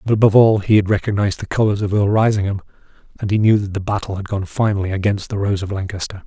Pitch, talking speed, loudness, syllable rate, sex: 100 Hz, 240 wpm, -18 LUFS, 7.0 syllables/s, male